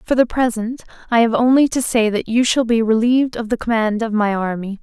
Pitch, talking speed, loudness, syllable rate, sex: 230 Hz, 235 wpm, -17 LUFS, 5.6 syllables/s, female